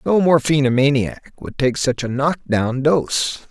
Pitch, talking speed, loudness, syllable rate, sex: 135 Hz, 155 wpm, -18 LUFS, 3.9 syllables/s, male